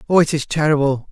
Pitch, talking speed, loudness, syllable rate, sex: 150 Hz, 215 wpm, -17 LUFS, 6.5 syllables/s, male